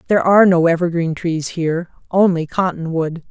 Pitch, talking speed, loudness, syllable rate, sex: 170 Hz, 145 wpm, -17 LUFS, 5.6 syllables/s, female